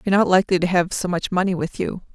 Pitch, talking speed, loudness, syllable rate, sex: 180 Hz, 280 wpm, -20 LUFS, 7.2 syllables/s, female